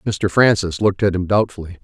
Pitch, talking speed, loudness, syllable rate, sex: 95 Hz, 195 wpm, -17 LUFS, 6.1 syllables/s, male